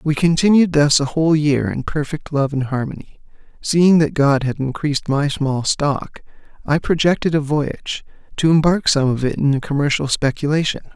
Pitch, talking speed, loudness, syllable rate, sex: 145 Hz, 175 wpm, -17 LUFS, 5.1 syllables/s, male